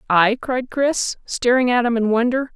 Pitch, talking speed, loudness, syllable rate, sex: 240 Hz, 190 wpm, -19 LUFS, 4.5 syllables/s, female